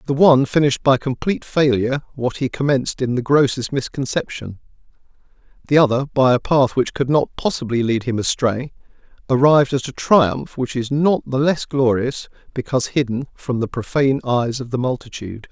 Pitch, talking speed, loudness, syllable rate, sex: 130 Hz, 170 wpm, -19 LUFS, 5.5 syllables/s, male